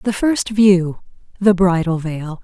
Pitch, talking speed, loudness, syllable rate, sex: 185 Hz, 150 wpm, -16 LUFS, 3.6 syllables/s, female